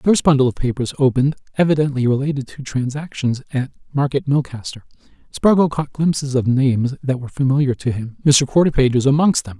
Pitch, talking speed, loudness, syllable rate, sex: 135 Hz, 170 wpm, -18 LUFS, 6.1 syllables/s, male